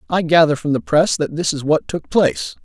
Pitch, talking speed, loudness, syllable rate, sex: 160 Hz, 250 wpm, -17 LUFS, 5.4 syllables/s, male